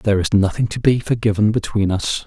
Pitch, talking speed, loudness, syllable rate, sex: 105 Hz, 210 wpm, -18 LUFS, 6.0 syllables/s, male